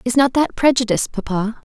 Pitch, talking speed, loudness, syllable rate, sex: 245 Hz, 170 wpm, -18 LUFS, 6.1 syllables/s, female